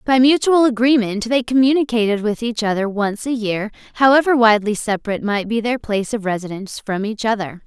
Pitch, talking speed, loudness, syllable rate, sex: 225 Hz, 180 wpm, -18 LUFS, 6.0 syllables/s, female